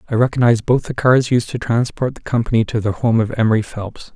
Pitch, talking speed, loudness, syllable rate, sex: 115 Hz, 230 wpm, -17 LUFS, 6.1 syllables/s, male